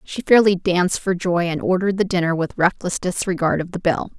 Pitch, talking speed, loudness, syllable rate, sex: 180 Hz, 215 wpm, -19 LUFS, 5.7 syllables/s, female